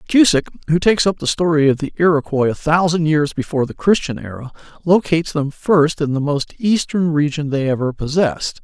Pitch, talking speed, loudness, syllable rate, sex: 155 Hz, 190 wpm, -17 LUFS, 5.8 syllables/s, male